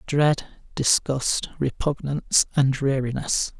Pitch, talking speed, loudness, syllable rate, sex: 135 Hz, 85 wpm, -23 LUFS, 3.6 syllables/s, male